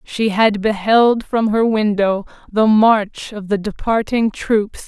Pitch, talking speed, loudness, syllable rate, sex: 215 Hz, 150 wpm, -16 LUFS, 3.5 syllables/s, female